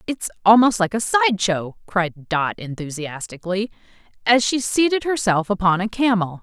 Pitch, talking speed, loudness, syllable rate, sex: 205 Hz, 150 wpm, -20 LUFS, 4.8 syllables/s, female